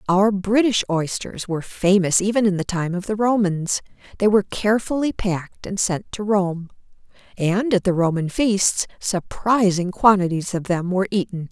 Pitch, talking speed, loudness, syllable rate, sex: 195 Hz, 160 wpm, -20 LUFS, 4.8 syllables/s, female